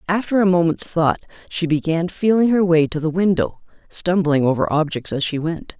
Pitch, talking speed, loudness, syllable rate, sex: 170 Hz, 185 wpm, -19 LUFS, 5.2 syllables/s, female